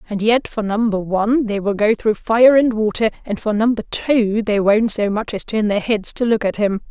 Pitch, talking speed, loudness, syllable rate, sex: 215 Hz, 245 wpm, -17 LUFS, 5.0 syllables/s, female